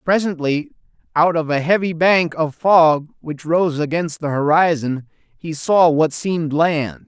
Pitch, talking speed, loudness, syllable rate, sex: 160 Hz, 155 wpm, -17 LUFS, 4.1 syllables/s, male